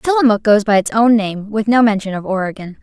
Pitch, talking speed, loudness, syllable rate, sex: 215 Hz, 235 wpm, -15 LUFS, 5.8 syllables/s, female